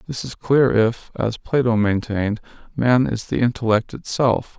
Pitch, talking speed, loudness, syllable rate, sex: 115 Hz, 155 wpm, -20 LUFS, 4.4 syllables/s, male